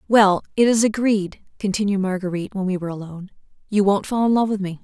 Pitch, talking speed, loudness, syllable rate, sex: 200 Hz, 210 wpm, -20 LUFS, 6.4 syllables/s, female